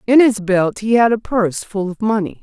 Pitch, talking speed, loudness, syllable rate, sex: 210 Hz, 250 wpm, -16 LUFS, 5.2 syllables/s, female